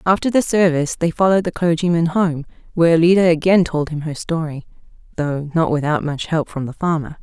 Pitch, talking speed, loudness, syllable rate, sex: 165 Hz, 190 wpm, -18 LUFS, 5.9 syllables/s, female